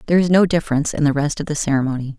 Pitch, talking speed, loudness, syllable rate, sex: 150 Hz, 275 wpm, -18 LUFS, 8.5 syllables/s, female